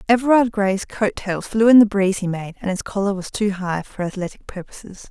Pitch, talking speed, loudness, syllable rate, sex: 200 Hz, 225 wpm, -19 LUFS, 5.6 syllables/s, female